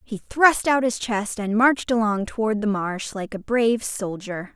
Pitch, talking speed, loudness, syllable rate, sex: 220 Hz, 200 wpm, -22 LUFS, 4.6 syllables/s, female